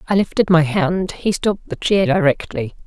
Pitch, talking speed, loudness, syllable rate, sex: 170 Hz, 190 wpm, -18 LUFS, 5.1 syllables/s, female